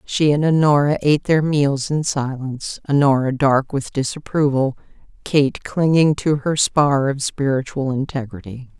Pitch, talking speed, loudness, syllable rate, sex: 140 Hz, 135 wpm, -18 LUFS, 4.5 syllables/s, female